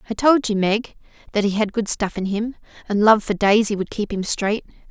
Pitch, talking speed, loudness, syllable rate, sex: 210 Hz, 235 wpm, -20 LUFS, 5.2 syllables/s, female